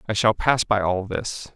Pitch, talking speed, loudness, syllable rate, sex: 105 Hz, 230 wpm, -22 LUFS, 4.4 syllables/s, male